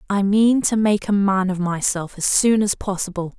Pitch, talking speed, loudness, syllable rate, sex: 195 Hz, 215 wpm, -19 LUFS, 4.8 syllables/s, female